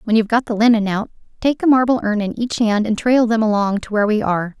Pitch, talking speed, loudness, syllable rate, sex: 220 Hz, 275 wpm, -17 LUFS, 6.5 syllables/s, female